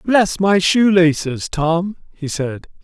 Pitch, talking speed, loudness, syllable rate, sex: 175 Hz, 150 wpm, -16 LUFS, 3.4 syllables/s, male